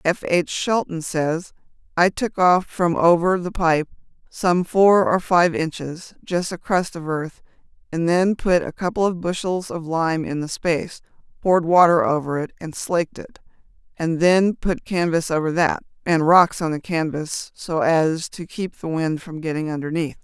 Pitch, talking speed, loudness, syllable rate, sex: 170 Hz, 180 wpm, -20 LUFS, 4.4 syllables/s, female